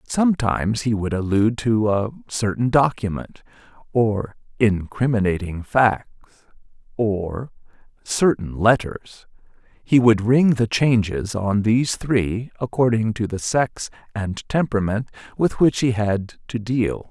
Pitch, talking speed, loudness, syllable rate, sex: 110 Hz, 115 wpm, -21 LUFS, 4.1 syllables/s, male